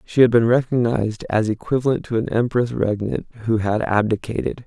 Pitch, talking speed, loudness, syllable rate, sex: 115 Hz, 165 wpm, -20 LUFS, 5.5 syllables/s, male